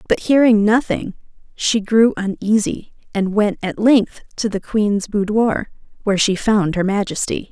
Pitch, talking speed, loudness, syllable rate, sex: 210 Hz, 150 wpm, -17 LUFS, 4.3 syllables/s, female